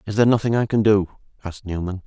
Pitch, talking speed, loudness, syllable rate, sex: 100 Hz, 235 wpm, -20 LUFS, 7.7 syllables/s, male